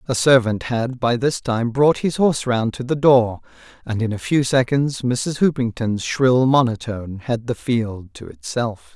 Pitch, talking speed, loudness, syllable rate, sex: 125 Hz, 180 wpm, -19 LUFS, 4.3 syllables/s, male